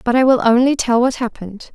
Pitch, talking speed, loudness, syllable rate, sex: 240 Hz, 240 wpm, -15 LUFS, 6.1 syllables/s, female